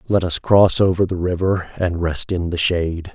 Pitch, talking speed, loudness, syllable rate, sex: 90 Hz, 210 wpm, -19 LUFS, 4.9 syllables/s, male